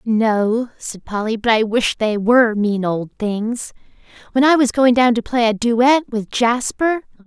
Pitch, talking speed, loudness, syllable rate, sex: 230 Hz, 180 wpm, -17 LUFS, 4.0 syllables/s, female